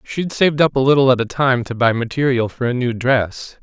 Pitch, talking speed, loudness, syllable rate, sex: 130 Hz, 250 wpm, -17 LUFS, 5.4 syllables/s, male